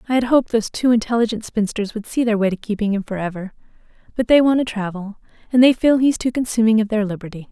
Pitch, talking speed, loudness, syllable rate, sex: 220 Hz, 230 wpm, -18 LUFS, 6.7 syllables/s, female